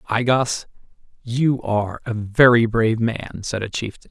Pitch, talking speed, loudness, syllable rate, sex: 115 Hz, 160 wpm, -20 LUFS, 4.4 syllables/s, male